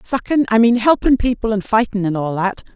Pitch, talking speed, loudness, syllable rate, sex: 220 Hz, 195 wpm, -16 LUFS, 5.3 syllables/s, female